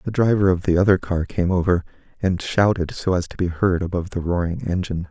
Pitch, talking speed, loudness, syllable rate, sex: 90 Hz, 225 wpm, -21 LUFS, 6.1 syllables/s, male